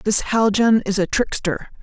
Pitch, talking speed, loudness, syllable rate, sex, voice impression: 210 Hz, 165 wpm, -19 LUFS, 4.4 syllables/s, female, feminine, adult-like, tensed, powerful, slightly hard, clear, fluent, intellectual, calm, slightly friendly, reassuring, elegant, lively